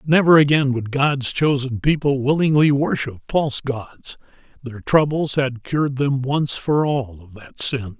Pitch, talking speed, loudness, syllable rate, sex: 135 Hz, 160 wpm, -19 LUFS, 4.3 syllables/s, male